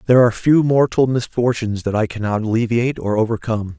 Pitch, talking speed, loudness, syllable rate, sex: 115 Hz, 175 wpm, -18 LUFS, 6.6 syllables/s, male